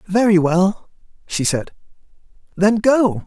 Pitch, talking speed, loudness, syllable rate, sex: 195 Hz, 110 wpm, -17 LUFS, 3.6 syllables/s, male